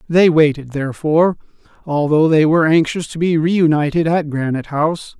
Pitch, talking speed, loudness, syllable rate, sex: 155 Hz, 150 wpm, -16 LUFS, 5.5 syllables/s, male